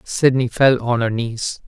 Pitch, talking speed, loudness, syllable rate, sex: 120 Hz, 180 wpm, -18 LUFS, 4.0 syllables/s, male